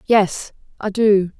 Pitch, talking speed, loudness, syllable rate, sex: 200 Hz, 130 wpm, -18 LUFS, 3.1 syllables/s, female